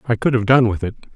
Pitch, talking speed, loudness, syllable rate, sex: 115 Hz, 310 wpm, -17 LUFS, 6.8 syllables/s, male